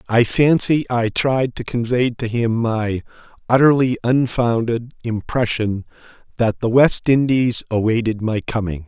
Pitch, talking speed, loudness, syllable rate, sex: 120 Hz, 130 wpm, -18 LUFS, 3.8 syllables/s, male